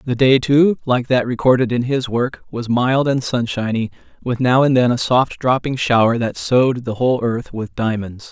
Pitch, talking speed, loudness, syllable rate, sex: 125 Hz, 200 wpm, -17 LUFS, 4.8 syllables/s, male